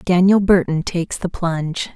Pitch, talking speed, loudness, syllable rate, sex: 175 Hz, 155 wpm, -18 LUFS, 5.0 syllables/s, female